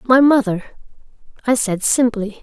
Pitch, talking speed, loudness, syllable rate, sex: 230 Hz, 125 wpm, -17 LUFS, 4.2 syllables/s, female